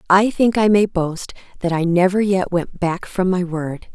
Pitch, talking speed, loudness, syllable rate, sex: 185 Hz, 215 wpm, -18 LUFS, 4.3 syllables/s, female